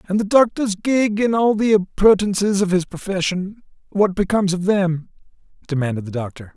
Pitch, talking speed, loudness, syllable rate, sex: 190 Hz, 155 wpm, -19 LUFS, 5.5 syllables/s, male